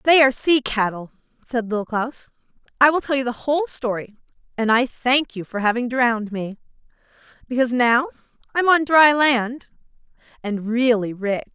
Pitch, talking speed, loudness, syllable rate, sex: 245 Hz, 165 wpm, -20 LUFS, 5.3 syllables/s, female